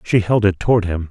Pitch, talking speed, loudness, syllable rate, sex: 100 Hz, 270 wpm, -17 LUFS, 5.9 syllables/s, male